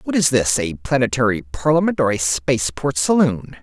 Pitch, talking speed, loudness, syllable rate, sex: 125 Hz, 165 wpm, -18 LUFS, 5.1 syllables/s, male